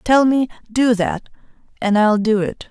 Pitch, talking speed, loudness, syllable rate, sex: 225 Hz, 175 wpm, -17 LUFS, 4.2 syllables/s, female